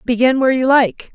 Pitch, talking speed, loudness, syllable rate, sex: 250 Hz, 210 wpm, -14 LUFS, 5.7 syllables/s, female